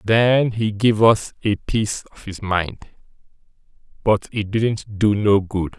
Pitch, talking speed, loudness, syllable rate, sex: 105 Hz, 155 wpm, -19 LUFS, 3.6 syllables/s, male